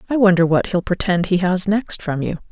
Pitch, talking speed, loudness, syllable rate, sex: 185 Hz, 240 wpm, -18 LUFS, 5.4 syllables/s, female